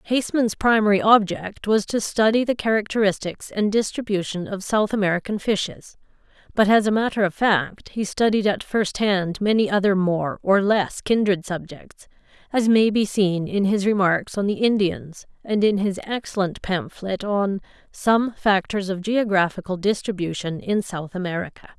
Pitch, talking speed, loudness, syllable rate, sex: 200 Hz, 155 wpm, -21 LUFS, 4.7 syllables/s, female